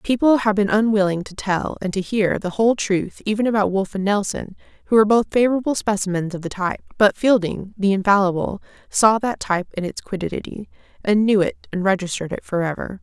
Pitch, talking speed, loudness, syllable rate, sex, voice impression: 200 Hz, 200 wpm, -20 LUFS, 6.1 syllables/s, female, feminine, adult-like, tensed, slightly weak, slightly dark, soft, clear, intellectual, calm, friendly, reassuring, elegant, slightly lively, slightly sharp